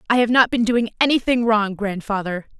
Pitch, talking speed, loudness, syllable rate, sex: 220 Hz, 185 wpm, -19 LUFS, 5.4 syllables/s, female